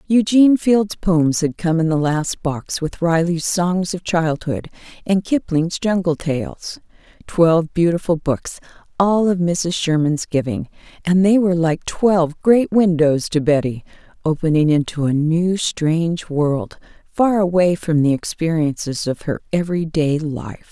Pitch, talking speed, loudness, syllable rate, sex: 170 Hz, 150 wpm, -18 LUFS, 4.2 syllables/s, female